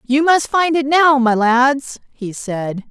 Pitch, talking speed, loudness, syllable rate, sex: 265 Hz, 185 wpm, -15 LUFS, 3.4 syllables/s, female